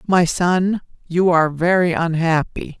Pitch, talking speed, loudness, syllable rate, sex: 170 Hz, 130 wpm, -18 LUFS, 4.2 syllables/s, female